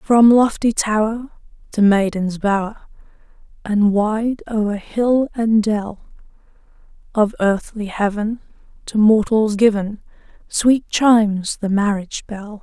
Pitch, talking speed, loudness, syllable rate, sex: 215 Hz, 110 wpm, -18 LUFS, 3.8 syllables/s, female